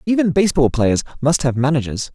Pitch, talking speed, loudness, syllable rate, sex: 145 Hz, 170 wpm, -17 LUFS, 6.0 syllables/s, male